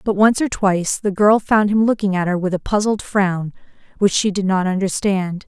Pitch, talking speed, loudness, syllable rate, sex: 195 Hz, 220 wpm, -18 LUFS, 5.1 syllables/s, female